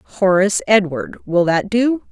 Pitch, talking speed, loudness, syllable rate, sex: 200 Hz, 140 wpm, -16 LUFS, 5.0 syllables/s, female